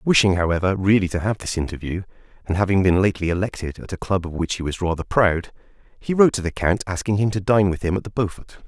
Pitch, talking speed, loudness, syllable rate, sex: 95 Hz, 240 wpm, -21 LUFS, 6.6 syllables/s, male